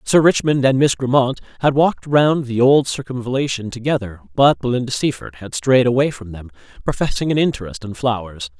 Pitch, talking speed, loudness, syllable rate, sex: 125 Hz, 175 wpm, -18 LUFS, 5.5 syllables/s, male